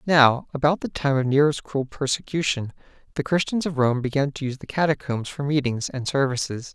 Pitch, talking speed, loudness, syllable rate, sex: 140 Hz, 185 wpm, -23 LUFS, 5.6 syllables/s, male